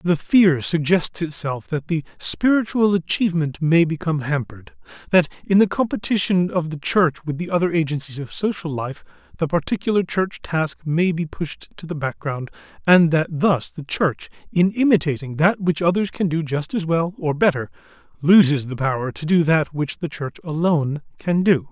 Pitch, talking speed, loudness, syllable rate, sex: 165 Hz, 175 wpm, -20 LUFS, 5.0 syllables/s, male